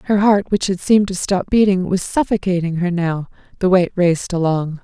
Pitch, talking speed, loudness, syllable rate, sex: 185 Hz, 210 wpm, -17 LUFS, 5.5 syllables/s, female